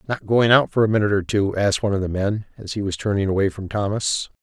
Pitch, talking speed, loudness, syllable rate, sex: 105 Hz, 270 wpm, -21 LUFS, 6.7 syllables/s, male